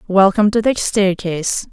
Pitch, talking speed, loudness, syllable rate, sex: 200 Hz, 140 wpm, -16 LUFS, 5.3 syllables/s, female